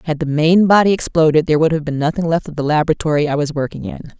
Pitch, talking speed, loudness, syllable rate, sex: 155 Hz, 260 wpm, -16 LUFS, 7.2 syllables/s, female